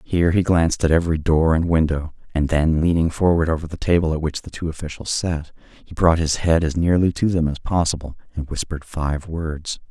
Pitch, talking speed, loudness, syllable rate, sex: 80 Hz, 210 wpm, -20 LUFS, 5.6 syllables/s, male